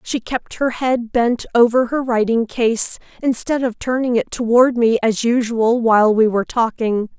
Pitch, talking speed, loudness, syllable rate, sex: 235 Hz, 175 wpm, -17 LUFS, 4.5 syllables/s, female